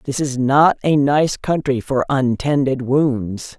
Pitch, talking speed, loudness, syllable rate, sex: 135 Hz, 150 wpm, -17 LUFS, 3.6 syllables/s, female